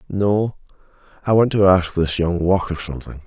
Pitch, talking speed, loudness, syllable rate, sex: 95 Hz, 165 wpm, -18 LUFS, 5.2 syllables/s, male